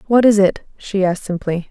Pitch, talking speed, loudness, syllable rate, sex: 195 Hz, 210 wpm, -17 LUFS, 5.7 syllables/s, female